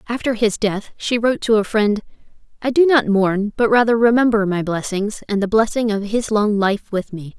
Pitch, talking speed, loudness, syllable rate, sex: 215 Hz, 210 wpm, -18 LUFS, 5.1 syllables/s, female